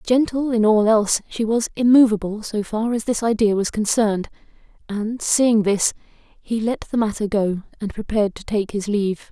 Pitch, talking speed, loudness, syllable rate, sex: 215 Hz, 180 wpm, -20 LUFS, 4.9 syllables/s, female